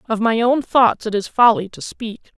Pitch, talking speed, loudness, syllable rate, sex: 230 Hz, 225 wpm, -16 LUFS, 4.7 syllables/s, female